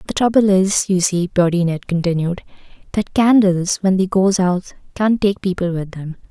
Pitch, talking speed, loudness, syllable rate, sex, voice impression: 185 Hz, 180 wpm, -17 LUFS, 4.8 syllables/s, female, very feminine, slightly gender-neutral, young, thin, slightly tensed, slightly weak, slightly dark, very soft, very clear, fluent, slightly raspy, very cute, intellectual, refreshing, sincere, calm, very friendly, very reassuring, very unique, elegant, slightly wild, sweet, lively, kind, slightly sharp, modest, light